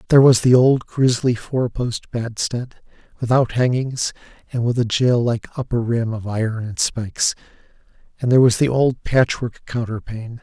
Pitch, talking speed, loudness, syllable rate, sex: 120 Hz, 165 wpm, -19 LUFS, 4.8 syllables/s, male